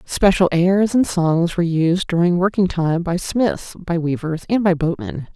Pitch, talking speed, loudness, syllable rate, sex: 175 Hz, 180 wpm, -18 LUFS, 4.3 syllables/s, female